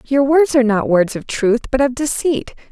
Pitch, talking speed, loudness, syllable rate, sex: 255 Hz, 220 wpm, -16 LUFS, 5.2 syllables/s, female